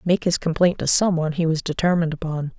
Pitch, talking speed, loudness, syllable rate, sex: 165 Hz, 230 wpm, -21 LUFS, 6.5 syllables/s, female